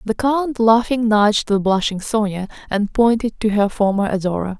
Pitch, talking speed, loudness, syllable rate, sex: 215 Hz, 170 wpm, -18 LUFS, 4.9 syllables/s, female